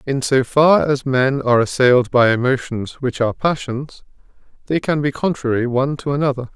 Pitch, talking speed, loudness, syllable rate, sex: 135 Hz, 175 wpm, -17 LUFS, 5.4 syllables/s, male